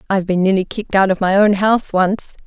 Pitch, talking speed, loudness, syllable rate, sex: 195 Hz, 245 wpm, -16 LUFS, 6.5 syllables/s, female